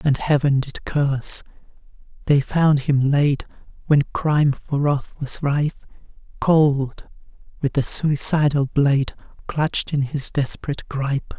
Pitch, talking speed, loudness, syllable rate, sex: 140 Hz, 115 wpm, -20 LUFS, 4.2 syllables/s, female